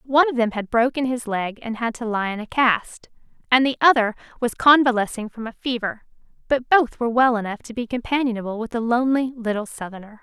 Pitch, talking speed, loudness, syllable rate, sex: 235 Hz, 200 wpm, -21 LUFS, 5.8 syllables/s, female